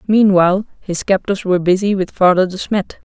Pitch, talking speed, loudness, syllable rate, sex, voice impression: 190 Hz, 175 wpm, -15 LUFS, 5.5 syllables/s, female, feminine, adult-like, tensed, powerful, clear, slightly halting, nasal, intellectual, calm, friendly, reassuring, unique, kind